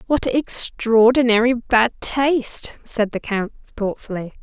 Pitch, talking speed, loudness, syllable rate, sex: 235 Hz, 110 wpm, -19 LUFS, 3.8 syllables/s, female